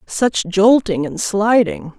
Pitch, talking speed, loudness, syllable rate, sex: 210 Hz, 120 wpm, -16 LUFS, 3.3 syllables/s, female